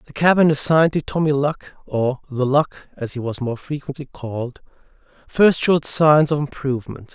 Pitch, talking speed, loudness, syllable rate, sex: 140 Hz, 150 wpm, -19 LUFS, 5.2 syllables/s, male